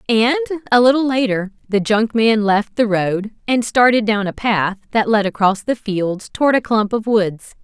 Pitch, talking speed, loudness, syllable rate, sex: 220 Hz, 195 wpm, -17 LUFS, 4.5 syllables/s, female